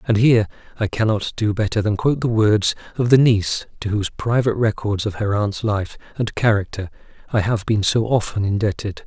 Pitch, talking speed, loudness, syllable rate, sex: 105 Hz, 190 wpm, -20 LUFS, 5.6 syllables/s, male